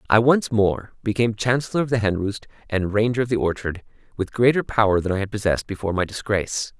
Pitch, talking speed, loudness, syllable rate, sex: 105 Hz, 210 wpm, -22 LUFS, 6.4 syllables/s, male